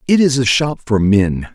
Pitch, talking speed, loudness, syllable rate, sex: 120 Hz, 235 wpm, -14 LUFS, 4.6 syllables/s, male